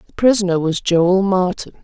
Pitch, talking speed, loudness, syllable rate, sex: 190 Hz, 165 wpm, -16 LUFS, 5.0 syllables/s, female